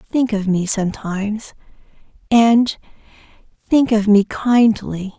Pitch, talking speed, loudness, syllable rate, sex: 215 Hz, 95 wpm, -17 LUFS, 4.0 syllables/s, female